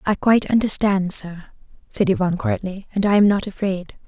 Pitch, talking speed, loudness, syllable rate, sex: 195 Hz, 175 wpm, -19 LUFS, 5.5 syllables/s, female